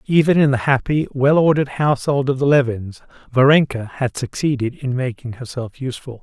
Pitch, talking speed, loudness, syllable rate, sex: 135 Hz, 165 wpm, -18 LUFS, 5.6 syllables/s, male